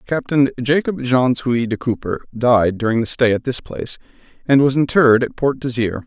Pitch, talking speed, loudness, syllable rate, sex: 125 Hz, 190 wpm, -17 LUFS, 5.3 syllables/s, male